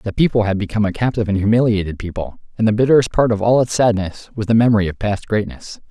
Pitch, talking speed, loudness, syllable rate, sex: 105 Hz, 235 wpm, -17 LUFS, 6.9 syllables/s, male